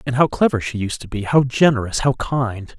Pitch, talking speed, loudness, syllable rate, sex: 120 Hz, 235 wpm, -19 LUFS, 5.2 syllables/s, male